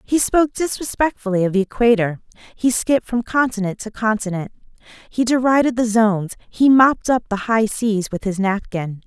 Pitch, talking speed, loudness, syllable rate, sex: 225 Hz, 165 wpm, -18 LUFS, 5.3 syllables/s, female